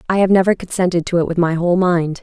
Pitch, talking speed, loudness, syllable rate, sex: 175 Hz, 270 wpm, -16 LUFS, 6.8 syllables/s, female